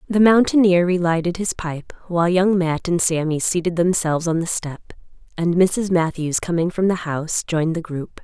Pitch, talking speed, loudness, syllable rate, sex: 175 Hz, 180 wpm, -19 LUFS, 5.1 syllables/s, female